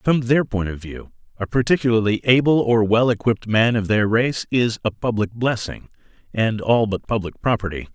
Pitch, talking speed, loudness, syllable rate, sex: 115 Hz, 180 wpm, -20 LUFS, 5.2 syllables/s, male